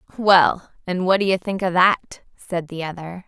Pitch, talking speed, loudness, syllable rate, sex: 180 Hz, 200 wpm, -19 LUFS, 4.8 syllables/s, female